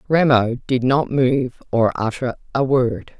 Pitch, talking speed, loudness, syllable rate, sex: 125 Hz, 150 wpm, -19 LUFS, 3.7 syllables/s, female